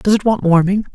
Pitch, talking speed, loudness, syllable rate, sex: 195 Hz, 255 wpm, -14 LUFS, 5.8 syllables/s, female